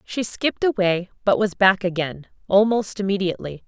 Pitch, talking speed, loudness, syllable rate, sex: 195 Hz, 145 wpm, -21 LUFS, 5.3 syllables/s, female